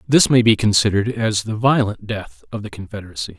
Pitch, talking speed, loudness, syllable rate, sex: 105 Hz, 195 wpm, -18 LUFS, 6.0 syllables/s, male